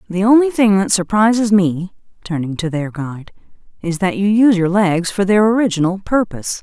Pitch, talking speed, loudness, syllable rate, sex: 195 Hz, 165 wpm, -15 LUFS, 5.5 syllables/s, female